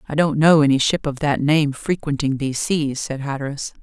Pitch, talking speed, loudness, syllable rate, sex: 145 Hz, 205 wpm, -19 LUFS, 5.3 syllables/s, female